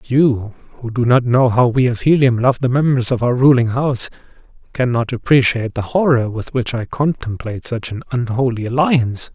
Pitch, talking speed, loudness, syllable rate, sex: 125 Hz, 180 wpm, -16 LUFS, 5.1 syllables/s, male